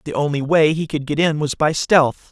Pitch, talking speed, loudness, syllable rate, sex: 155 Hz, 260 wpm, -18 LUFS, 5.0 syllables/s, male